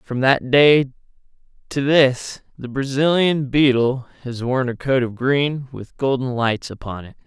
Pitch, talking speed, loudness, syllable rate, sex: 130 Hz, 155 wpm, -19 LUFS, 4.0 syllables/s, male